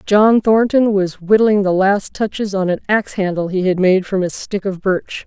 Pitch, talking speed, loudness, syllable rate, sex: 195 Hz, 215 wpm, -16 LUFS, 4.7 syllables/s, female